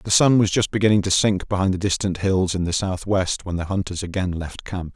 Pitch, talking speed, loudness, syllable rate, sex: 95 Hz, 240 wpm, -21 LUFS, 5.5 syllables/s, male